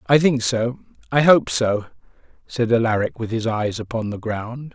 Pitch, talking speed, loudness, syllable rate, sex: 120 Hz, 175 wpm, -20 LUFS, 4.7 syllables/s, male